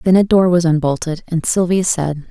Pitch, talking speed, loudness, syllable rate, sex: 170 Hz, 210 wpm, -15 LUFS, 5.0 syllables/s, female